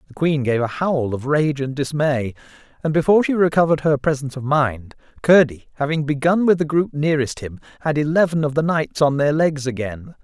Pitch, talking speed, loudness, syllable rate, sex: 145 Hz, 200 wpm, -19 LUFS, 5.7 syllables/s, male